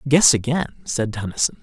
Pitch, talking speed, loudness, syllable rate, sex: 130 Hz, 150 wpm, -20 LUFS, 5.2 syllables/s, male